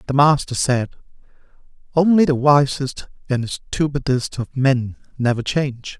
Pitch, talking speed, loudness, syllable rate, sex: 135 Hz, 120 wpm, -19 LUFS, 4.4 syllables/s, male